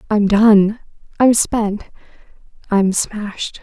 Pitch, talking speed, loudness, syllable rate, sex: 210 Hz, 65 wpm, -15 LUFS, 3.1 syllables/s, female